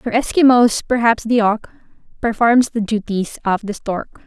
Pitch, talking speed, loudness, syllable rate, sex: 225 Hz, 155 wpm, -17 LUFS, 4.5 syllables/s, female